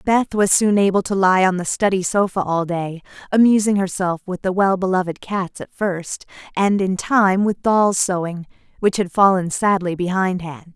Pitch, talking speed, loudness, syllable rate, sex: 190 Hz, 185 wpm, -18 LUFS, 4.7 syllables/s, female